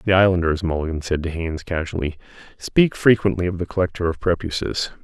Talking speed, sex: 165 wpm, male